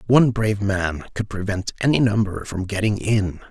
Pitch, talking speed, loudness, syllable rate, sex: 105 Hz, 170 wpm, -21 LUFS, 5.2 syllables/s, male